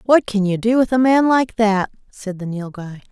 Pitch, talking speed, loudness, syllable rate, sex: 215 Hz, 230 wpm, -17 LUFS, 4.7 syllables/s, female